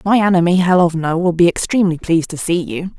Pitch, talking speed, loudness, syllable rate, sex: 175 Hz, 200 wpm, -15 LUFS, 6.3 syllables/s, female